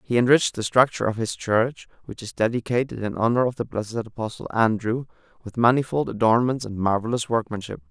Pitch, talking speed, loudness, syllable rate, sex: 115 Hz, 175 wpm, -23 LUFS, 6.0 syllables/s, male